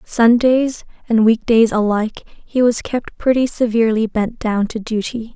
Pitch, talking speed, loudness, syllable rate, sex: 230 Hz, 155 wpm, -17 LUFS, 4.5 syllables/s, female